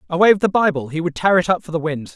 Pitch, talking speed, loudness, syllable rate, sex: 170 Hz, 335 wpm, -18 LUFS, 7.1 syllables/s, male